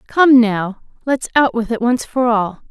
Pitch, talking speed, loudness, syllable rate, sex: 235 Hz, 200 wpm, -15 LUFS, 4.1 syllables/s, female